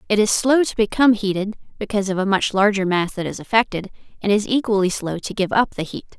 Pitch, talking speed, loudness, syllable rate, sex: 205 Hz, 235 wpm, -20 LUFS, 6.3 syllables/s, female